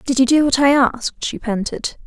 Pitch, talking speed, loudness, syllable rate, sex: 260 Hz, 235 wpm, -17 LUFS, 5.2 syllables/s, female